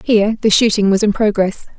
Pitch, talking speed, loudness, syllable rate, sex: 210 Hz, 200 wpm, -14 LUFS, 5.9 syllables/s, female